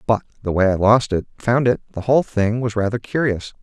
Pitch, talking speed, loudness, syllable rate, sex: 110 Hz, 180 wpm, -19 LUFS, 5.8 syllables/s, male